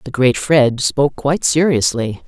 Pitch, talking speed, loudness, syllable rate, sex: 140 Hz, 160 wpm, -15 LUFS, 4.7 syllables/s, female